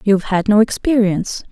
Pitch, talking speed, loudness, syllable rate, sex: 210 Hz, 160 wpm, -15 LUFS, 5.9 syllables/s, female